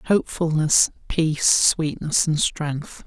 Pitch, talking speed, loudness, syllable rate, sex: 160 Hz, 100 wpm, -20 LUFS, 3.5 syllables/s, male